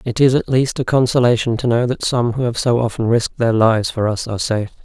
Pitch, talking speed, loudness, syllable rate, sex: 120 Hz, 260 wpm, -17 LUFS, 6.3 syllables/s, male